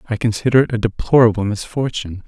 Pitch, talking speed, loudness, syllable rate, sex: 115 Hz, 160 wpm, -17 LUFS, 6.5 syllables/s, male